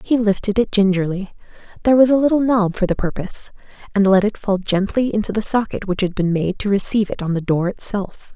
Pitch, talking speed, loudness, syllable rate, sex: 205 Hz, 210 wpm, -18 LUFS, 6.0 syllables/s, female